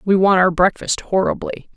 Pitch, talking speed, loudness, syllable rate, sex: 185 Hz, 170 wpm, -17 LUFS, 4.9 syllables/s, female